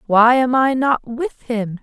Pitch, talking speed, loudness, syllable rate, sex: 245 Hz, 195 wpm, -17 LUFS, 3.6 syllables/s, female